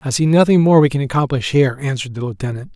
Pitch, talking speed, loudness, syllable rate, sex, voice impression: 140 Hz, 240 wpm, -16 LUFS, 7.2 syllables/s, male, masculine, very adult-like, slightly muffled, slightly refreshing, sincere, slightly elegant